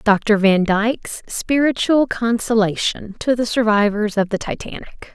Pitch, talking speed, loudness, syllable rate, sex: 220 Hz, 130 wpm, -18 LUFS, 4.2 syllables/s, female